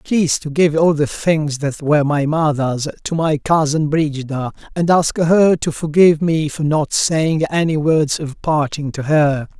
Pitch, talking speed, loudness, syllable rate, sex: 155 Hz, 180 wpm, -16 LUFS, 4.4 syllables/s, male